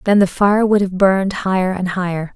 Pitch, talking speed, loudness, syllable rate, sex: 190 Hz, 230 wpm, -16 LUFS, 5.4 syllables/s, female